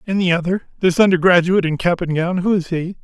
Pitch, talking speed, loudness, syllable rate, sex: 180 Hz, 200 wpm, -17 LUFS, 6.4 syllables/s, male